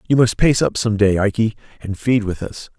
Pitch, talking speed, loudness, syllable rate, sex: 110 Hz, 235 wpm, -18 LUFS, 5.2 syllables/s, male